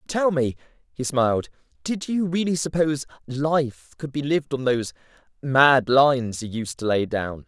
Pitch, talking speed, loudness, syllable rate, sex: 140 Hz, 170 wpm, -23 LUFS, 4.8 syllables/s, male